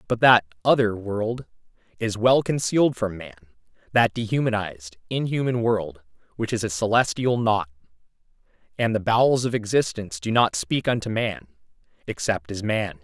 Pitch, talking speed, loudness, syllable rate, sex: 110 Hz, 145 wpm, -23 LUFS, 5.1 syllables/s, male